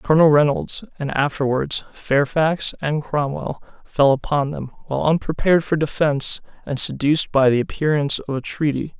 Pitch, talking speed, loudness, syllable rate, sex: 145 Hz, 145 wpm, -20 LUFS, 5.2 syllables/s, male